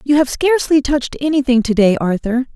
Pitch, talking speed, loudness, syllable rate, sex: 265 Hz, 190 wpm, -15 LUFS, 5.8 syllables/s, female